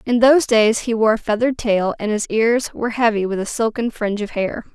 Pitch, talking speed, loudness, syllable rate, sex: 225 Hz, 240 wpm, -18 LUFS, 5.8 syllables/s, female